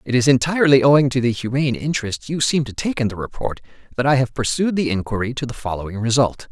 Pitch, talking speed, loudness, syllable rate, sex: 130 Hz, 230 wpm, -19 LUFS, 6.8 syllables/s, male